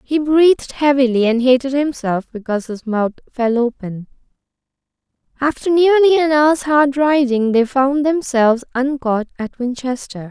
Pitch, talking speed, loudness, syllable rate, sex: 265 Hz, 135 wpm, -16 LUFS, 4.6 syllables/s, female